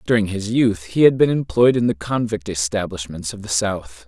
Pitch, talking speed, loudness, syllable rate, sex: 105 Hz, 205 wpm, -19 LUFS, 5.1 syllables/s, male